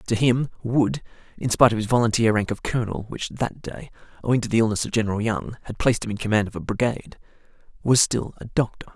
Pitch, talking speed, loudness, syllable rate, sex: 115 Hz, 220 wpm, -23 LUFS, 6.6 syllables/s, male